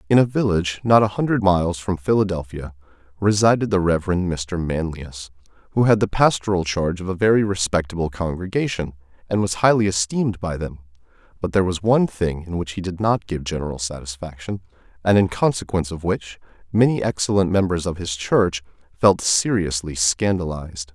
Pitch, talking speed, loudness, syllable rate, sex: 90 Hz, 165 wpm, -21 LUFS, 5.7 syllables/s, male